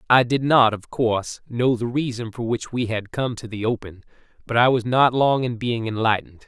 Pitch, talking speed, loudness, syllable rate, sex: 120 Hz, 220 wpm, -21 LUFS, 5.2 syllables/s, male